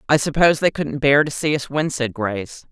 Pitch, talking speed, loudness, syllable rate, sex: 140 Hz, 245 wpm, -19 LUFS, 5.6 syllables/s, female